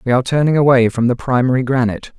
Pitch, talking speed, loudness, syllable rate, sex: 125 Hz, 220 wpm, -15 LUFS, 7.4 syllables/s, male